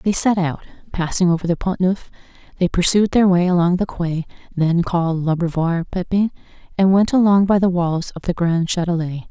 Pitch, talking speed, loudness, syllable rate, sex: 180 Hz, 185 wpm, -18 LUFS, 5.2 syllables/s, female